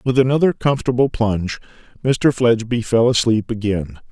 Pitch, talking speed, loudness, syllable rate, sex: 115 Hz, 130 wpm, -18 LUFS, 5.6 syllables/s, male